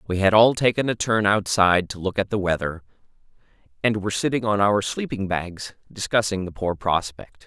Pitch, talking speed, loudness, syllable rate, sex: 100 Hz, 185 wpm, -22 LUFS, 5.3 syllables/s, male